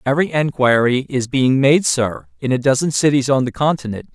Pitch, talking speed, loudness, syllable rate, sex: 135 Hz, 190 wpm, -17 LUFS, 5.5 syllables/s, male